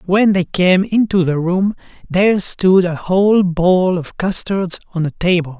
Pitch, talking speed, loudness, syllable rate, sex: 185 Hz, 180 wpm, -15 LUFS, 4.4 syllables/s, male